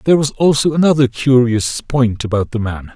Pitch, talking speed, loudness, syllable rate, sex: 125 Hz, 185 wpm, -15 LUFS, 5.3 syllables/s, male